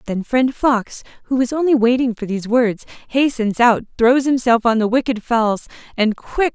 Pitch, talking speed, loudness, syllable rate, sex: 240 Hz, 185 wpm, -17 LUFS, 4.7 syllables/s, female